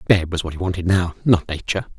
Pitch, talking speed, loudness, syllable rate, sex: 90 Hz, 240 wpm, -20 LUFS, 6.7 syllables/s, male